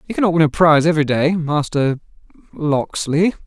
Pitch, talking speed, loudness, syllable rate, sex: 155 Hz, 140 wpm, -17 LUFS, 5.6 syllables/s, male